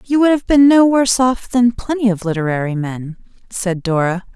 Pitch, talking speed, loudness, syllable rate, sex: 220 Hz, 195 wpm, -15 LUFS, 5.1 syllables/s, female